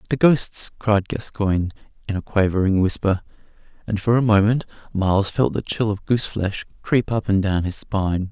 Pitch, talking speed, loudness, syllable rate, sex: 105 Hz, 180 wpm, -21 LUFS, 5.2 syllables/s, male